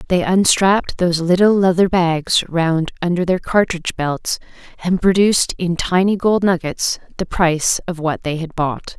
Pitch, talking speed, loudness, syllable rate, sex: 175 Hz, 160 wpm, -17 LUFS, 4.6 syllables/s, female